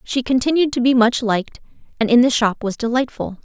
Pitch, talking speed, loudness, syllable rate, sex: 240 Hz, 210 wpm, -17 LUFS, 5.7 syllables/s, female